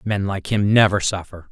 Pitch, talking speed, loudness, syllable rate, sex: 100 Hz, 200 wpm, -19 LUFS, 5.0 syllables/s, male